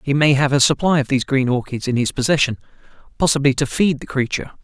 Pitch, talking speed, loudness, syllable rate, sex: 135 Hz, 205 wpm, -18 LUFS, 6.8 syllables/s, male